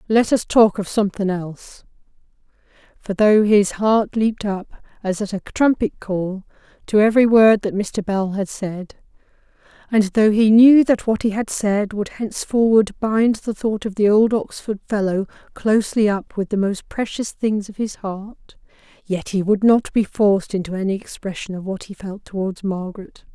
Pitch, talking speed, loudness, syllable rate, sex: 205 Hz, 175 wpm, -19 LUFS, 4.7 syllables/s, female